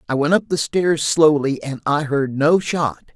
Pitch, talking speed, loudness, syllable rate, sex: 150 Hz, 210 wpm, -18 LUFS, 4.4 syllables/s, male